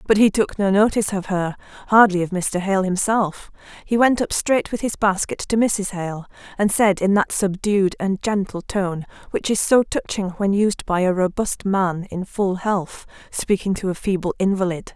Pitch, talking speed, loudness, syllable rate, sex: 195 Hz, 195 wpm, -20 LUFS, 4.6 syllables/s, female